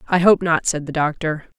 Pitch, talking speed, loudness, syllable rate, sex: 165 Hz, 225 wpm, -19 LUFS, 5.2 syllables/s, female